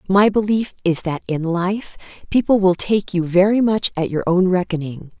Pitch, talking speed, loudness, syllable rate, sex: 185 Hz, 185 wpm, -18 LUFS, 4.7 syllables/s, female